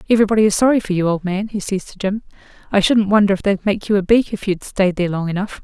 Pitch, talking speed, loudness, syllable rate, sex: 200 Hz, 275 wpm, -17 LUFS, 6.9 syllables/s, female